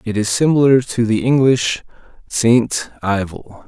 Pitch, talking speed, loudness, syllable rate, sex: 115 Hz, 130 wpm, -16 LUFS, 4.0 syllables/s, male